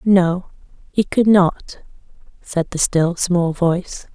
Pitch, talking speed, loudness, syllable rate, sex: 180 Hz, 130 wpm, -18 LUFS, 3.3 syllables/s, female